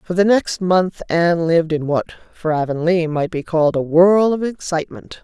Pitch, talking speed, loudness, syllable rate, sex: 170 Hz, 195 wpm, -17 LUFS, 5.2 syllables/s, female